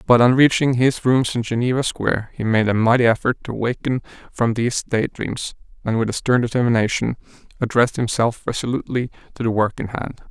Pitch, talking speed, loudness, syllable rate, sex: 120 Hz, 185 wpm, -20 LUFS, 5.8 syllables/s, male